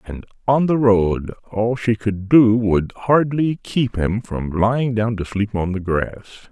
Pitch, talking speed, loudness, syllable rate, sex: 110 Hz, 185 wpm, -19 LUFS, 3.7 syllables/s, male